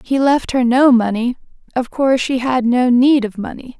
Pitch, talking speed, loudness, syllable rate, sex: 250 Hz, 205 wpm, -15 LUFS, 4.8 syllables/s, female